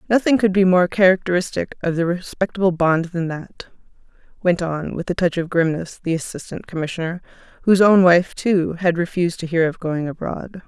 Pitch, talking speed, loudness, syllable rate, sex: 175 Hz, 180 wpm, -19 LUFS, 5.5 syllables/s, female